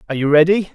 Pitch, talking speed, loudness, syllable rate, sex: 165 Hz, 240 wpm, -14 LUFS, 8.9 syllables/s, male